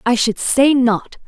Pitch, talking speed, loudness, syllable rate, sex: 240 Hz, 190 wpm, -15 LUFS, 3.6 syllables/s, female